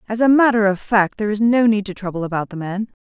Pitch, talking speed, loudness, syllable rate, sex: 210 Hz, 275 wpm, -18 LUFS, 6.5 syllables/s, female